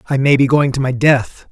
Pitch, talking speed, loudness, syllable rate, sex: 135 Hz, 280 wpm, -14 LUFS, 5.4 syllables/s, male